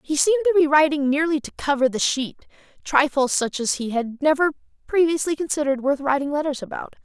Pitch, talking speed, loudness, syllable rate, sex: 290 Hz, 190 wpm, -21 LUFS, 6.4 syllables/s, female